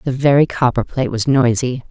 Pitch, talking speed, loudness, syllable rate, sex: 130 Hz, 155 wpm, -16 LUFS, 5.7 syllables/s, female